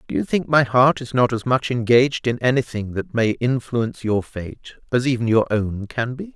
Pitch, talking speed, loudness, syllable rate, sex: 120 Hz, 215 wpm, -20 LUFS, 5.0 syllables/s, male